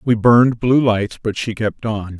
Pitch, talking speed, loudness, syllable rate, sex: 115 Hz, 220 wpm, -17 LUFS, 4.4 syllables/s, male